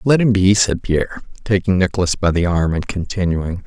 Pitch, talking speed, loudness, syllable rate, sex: 95 Hz, 195 wpm, -17 LUFS, 5.4 syllables/s, male